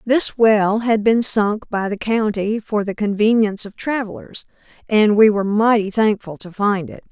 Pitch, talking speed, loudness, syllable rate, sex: 210 Hz, 175 wpm, -18 LUFS, 4.6 syllables/s, female